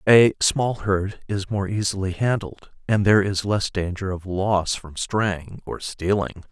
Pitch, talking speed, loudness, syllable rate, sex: 100 Hz, 165 wpm, -22 LUFS, 4.0 syllables/s, male